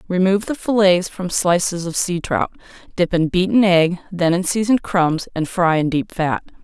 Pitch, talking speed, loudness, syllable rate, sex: 185 Hz, 190 wpm, -18 LUFS, 4.8 syllables/s, female